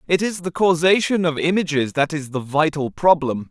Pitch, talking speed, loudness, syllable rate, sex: 160 Hz, 190 wpm, -19 LUFS, 5.1 syllables/s, male